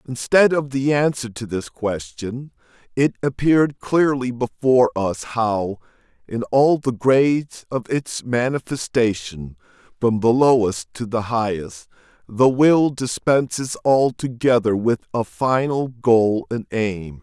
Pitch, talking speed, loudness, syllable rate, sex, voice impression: 125 Hz, 125 wpm, -20 LUFS, 3.9 syllables/s, male, masculine, adult-like, slightly powerful, slightly wild